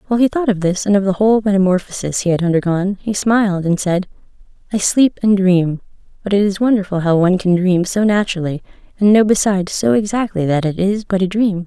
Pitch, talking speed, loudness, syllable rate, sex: 195 Hz, 215 wpm, -16 LUFS, 6.2 syllables/s, female